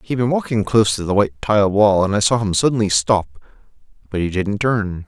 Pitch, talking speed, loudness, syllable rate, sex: 105 Hz, 225 wpm, -17 LUFS, 6.1 syllables/s, male